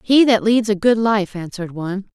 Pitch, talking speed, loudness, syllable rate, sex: 205 Hz, 225 wpm, -17 LUFS, 5.4 syllables/s, female